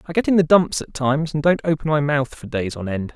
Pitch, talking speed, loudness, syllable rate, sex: 150 Hz, 305 wpm, -20 LUFS, 6.0 syllables/s, male